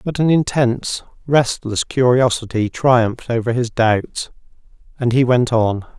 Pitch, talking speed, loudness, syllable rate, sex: 120 Hz, 130 wpm, -17 LUFS, 4.3 syllables/s, male